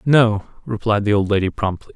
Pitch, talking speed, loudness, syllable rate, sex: 105 Hz, 185 wpm, -19 LUFS, 5.5 syllables/s, male